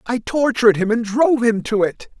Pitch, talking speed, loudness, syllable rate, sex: 230 Hz, 220 wpm, -17 LUFS, 5.5 syllables/s, male